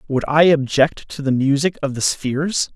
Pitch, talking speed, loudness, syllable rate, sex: 145 Hz, 195 wpm, -18 LUFS, 4.8 syllables/s, male